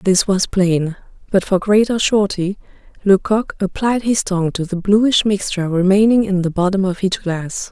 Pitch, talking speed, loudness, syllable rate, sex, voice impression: 195 Hz, 170 wpm, -16 LUFS, 4.8 syllables/s, female, feminine, adult-like, relaxed, slightly bright, soft, fluent, slightly raspy, intellectual, calm, friendly, reassuring, elegant, kind, slightly modest